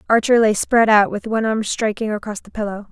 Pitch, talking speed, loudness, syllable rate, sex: 215 Hz, 225 wpm, -18 LUFS, 5.9 syllables/s, female